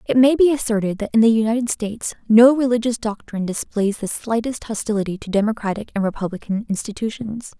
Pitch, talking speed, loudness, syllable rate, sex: 220 Hz, 165 wpm, -20 LUFS, 6.1 syllables/s, female